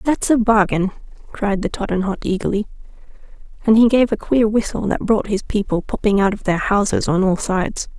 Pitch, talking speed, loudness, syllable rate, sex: 205 Hz, 190 wpm, -18 LUFS, 5.4 syllables/s, female